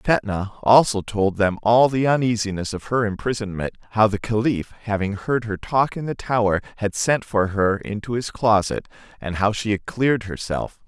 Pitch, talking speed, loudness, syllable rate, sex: 110 Hz, 180 wpm, -21 LUFS, 4.9 syllables/s, male